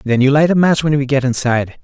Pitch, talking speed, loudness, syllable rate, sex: 135 Hz, 295 wpm, -14 LUFS, 6.4 syllables/s, male